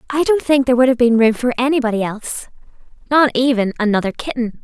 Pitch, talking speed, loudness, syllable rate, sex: 245 Hz, 195 wpm, -16 LUFS, 6.5 syllables/s, female